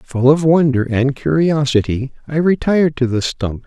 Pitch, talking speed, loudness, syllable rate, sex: 140 Hz, 165 wpm, -16 LUFS, 4.6 syllables/s, male